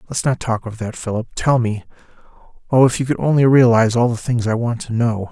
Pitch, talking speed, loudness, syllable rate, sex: 120 Hz, 225 wpm, -17 LUFS, 5.9 syllables/s, male